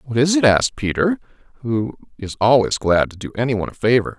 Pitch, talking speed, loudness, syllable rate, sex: 120 Hz, 215 wpm, -18 LUFS, 6.3 syllables/s, male